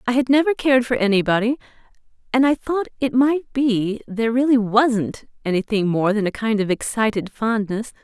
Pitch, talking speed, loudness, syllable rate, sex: 230 Hz, 170 wpm, -20 LUFS, 5.2 syllables/s, female